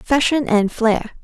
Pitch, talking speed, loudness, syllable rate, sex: 245 Hz, 145 wpm, -17 LUFS, 4.6 syllables/s, female